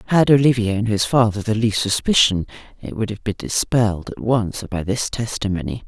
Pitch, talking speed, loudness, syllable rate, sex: 115 Hz, 185 wpm, -19 LUFS, 5.3 syllables/s, female